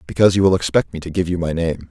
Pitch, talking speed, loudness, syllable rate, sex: 85 Hz, 315 wpm, -18 LUFS, 7.3 syllables/s, male